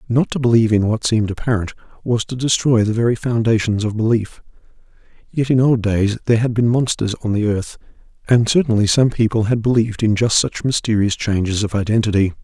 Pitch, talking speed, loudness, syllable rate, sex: 110 Hz, 190 wpm, -17 LUFS, 6.0 syllables/s, male